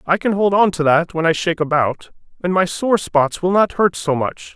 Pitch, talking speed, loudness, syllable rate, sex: 175 Hz, 250 wpm, -17 LUFS, 5.1 syllables/s, male